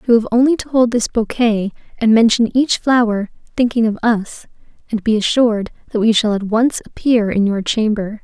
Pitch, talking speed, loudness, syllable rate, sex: 225 Hz, 190 wpm, -16 LUFS, 5.1 syllables/s, female